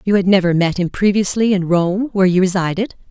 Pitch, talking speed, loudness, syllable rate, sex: 190 Hz, 210 wpm, -16 LUFS, 5.9 syllables/s, female